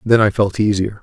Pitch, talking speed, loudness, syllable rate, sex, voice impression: 105 Hz, 235 wpm, -16 LUFS, 5.4 syllables/s, male, masculine, middle-aged, slightly relaxed, slightly fluent, raspy, intellectual, calm, mature, slightly friendly, wild, lively, strict